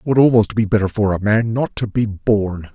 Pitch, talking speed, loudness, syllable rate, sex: 105 Hz, 265 wpm, -17 LUFS, 5.2 syllables/s, male